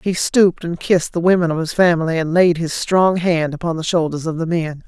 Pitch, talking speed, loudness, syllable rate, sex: 170 Hz, 245 wpm, -17 LUFS, 5.6 syllables/s, female